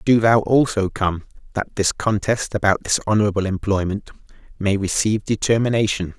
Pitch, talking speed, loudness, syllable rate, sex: 105 Hz, 135 wpm, -20 LUFS, 5.5 syllables/s, male